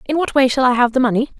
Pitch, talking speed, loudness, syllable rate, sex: 255 Hz, 345 wpm, -16 LUFS, 7.2 syllables/s, female